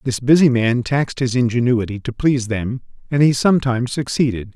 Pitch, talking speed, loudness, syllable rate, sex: 125 Hz, 170 wpm, -18 LUFS, 5.8 syllables/s, male